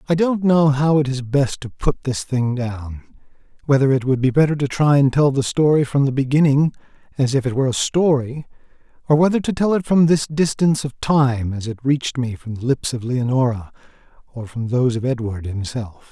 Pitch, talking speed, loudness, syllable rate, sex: 135 Hz, 210 wpm, -19 LUFS, 5.4 syllables/s, male